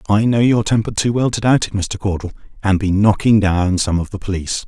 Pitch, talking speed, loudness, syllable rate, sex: 100 Hz, 230 wpm, -17 LUFS, 5.8 syllables/s, male